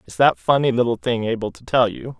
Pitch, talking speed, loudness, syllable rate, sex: 115 Hz, 245 wpm, -20 LUFS, 5.9 syllables/s, male